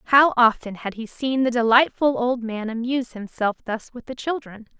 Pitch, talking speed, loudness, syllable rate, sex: 240 Hz, 190 wpm, -22 LUFS, 5.1 syllables/s, female